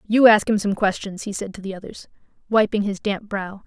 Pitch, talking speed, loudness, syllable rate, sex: 205 Hz, 230 wpm, -21 LUFS, 5.4 syllables/s, female